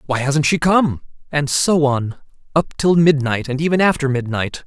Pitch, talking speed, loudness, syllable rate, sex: 145 Hz, 180 wpm, -17 LUFS, 4.7 syllables/s, male